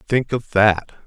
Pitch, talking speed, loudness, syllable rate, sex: 110 Hz, 170 wpm, -19 LUFS, 3.3 syllables/s, male